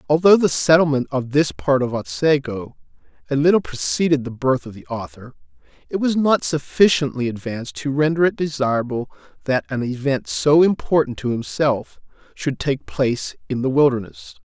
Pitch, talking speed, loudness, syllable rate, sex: 135 Hz, 160 wpm, -19 LUFS, 5.1 syllables/s, male